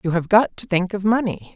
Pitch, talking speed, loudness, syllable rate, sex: 195 Hz, 270 wpm, -19 LUFS, 5.5 syllables/s, female